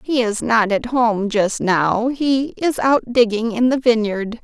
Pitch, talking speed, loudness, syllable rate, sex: 230 Hz, 190 wpm, -18 LUFS, 3.8 syllables/s, female